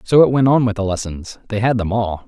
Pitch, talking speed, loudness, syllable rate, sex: 110 Hz, 290 wpm, -17 LUFS, 5.8 syllables/s, male